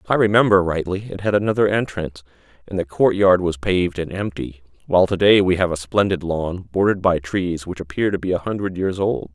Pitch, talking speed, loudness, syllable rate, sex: 90 Hz, 225 wpm, -19 LUFS, 5.9 syllables/s, male